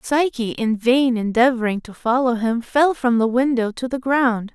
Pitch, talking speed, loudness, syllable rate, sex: 245 Hz, 185 wpm, -19 LUFS, 4.5 syllables/s, female